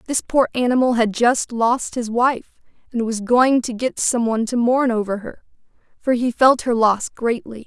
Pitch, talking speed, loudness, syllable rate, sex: 235 Hz, 195 wpm, -19 LUFS, 4.6 syllables/s, female